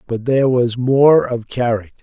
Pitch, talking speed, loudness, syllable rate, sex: 125 Hz, 180 wpm, -15 LUFS, 5.1 syllables/s, male